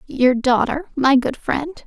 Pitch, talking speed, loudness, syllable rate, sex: 275 Hz, 160 wpm, -18 LUFS, 3.6 syllables/s, female